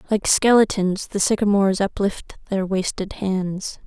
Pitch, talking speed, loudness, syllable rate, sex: 195 Hz, 125 wpm, -20 LUFS, 4.3 syllables/s, female